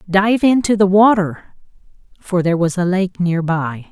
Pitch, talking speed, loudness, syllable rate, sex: 185 Hz, 170 wpm, -15 LUFS, 4.5 syllables/s, female